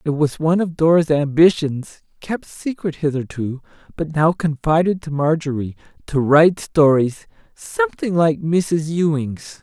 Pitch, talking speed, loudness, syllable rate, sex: 155 Hz, 130 wpm, -18 LUFS, 4.4 syllables/s, male